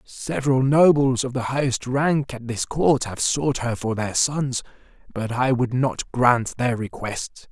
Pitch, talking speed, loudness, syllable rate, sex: 130 Hz, 175 wpm, -22 LUFS, 4.0 syllables/s, male